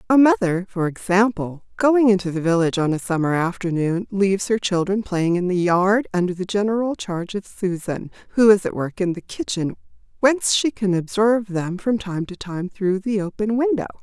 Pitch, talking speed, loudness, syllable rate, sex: 195 Hz, 190 wpm, -21 LUFS, 5.3 syllables/s, female